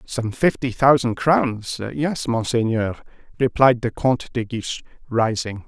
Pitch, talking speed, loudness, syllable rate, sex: 120 Hz, 125 wpm, -21 LUFS, 4.2 syllables/s, male